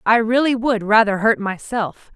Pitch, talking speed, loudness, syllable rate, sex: 225 Hz, 165 wpm, -18 LUFS, 4.5 syllables/s, female